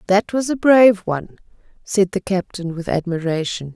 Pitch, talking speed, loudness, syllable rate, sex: 190 Hz, 160 wpm, -18 LUFS, 5.1 syllables/s, female